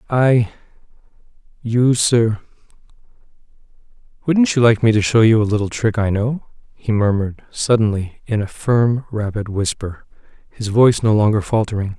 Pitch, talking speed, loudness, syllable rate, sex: 110 Hz, 140 wpm, -17 LUFS, 4.9 syllables/s, male